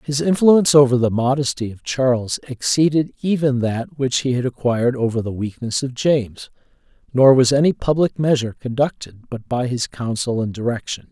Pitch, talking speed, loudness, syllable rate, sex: 130 Hz, 165 wpm, -18 LUFS, 5.3 syllables/s, male